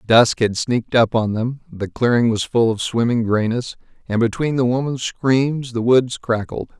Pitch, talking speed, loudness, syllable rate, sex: 120 Hz, 185 wpm, -19 LUFS, 4.5 syllables/s, male